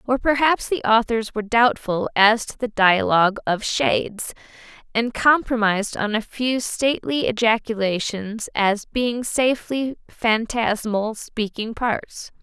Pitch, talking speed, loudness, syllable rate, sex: 225 Hz, 120 wpm, -21 LUFS, 4.1 syllables/s, female